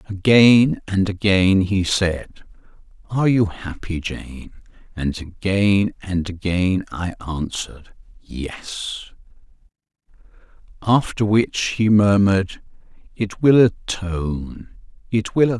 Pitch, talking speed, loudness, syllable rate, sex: 100 Hz, 95 wpm, -19 LUFS, 3.7 syllables/s, male